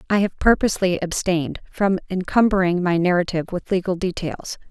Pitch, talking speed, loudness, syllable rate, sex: 185 Hz, 140 wpm, -21 LUFS, 5.8 syllables/s, female